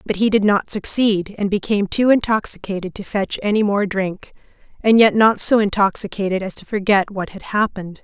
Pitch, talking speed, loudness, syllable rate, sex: 200 Hz, 185 wpm, -18 LUFS, 5.4 syllables/s, female